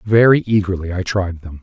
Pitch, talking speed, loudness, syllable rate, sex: 95 Hz, 185 wpm, -17 LUFS, 5.2 syllables/s, male